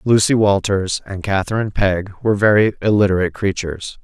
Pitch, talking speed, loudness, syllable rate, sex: 100 Hz, 135 wpm, -17 LUFS, 6.0 syllables/s, male